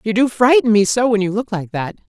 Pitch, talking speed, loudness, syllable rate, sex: 215 Hz, 280 wpm, -16 LUFS, 5.9 syllables/s, female